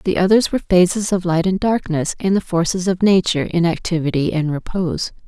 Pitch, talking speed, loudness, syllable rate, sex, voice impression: 180 Hz, 195 wpm, -18 LUFS, 5.8 syllables/s, female, very feminine, very adult-like, thin, tensed, slightly weak, slightly dark, slightly soft, very clear, very fluent, slightly raspy, slightly cute, cool, very intellectual, refreshing, very sincere, calm, very friendly, reassuring, unique, very elegant, slightly wild, sweet, slightly lively, kind, slightly modest, light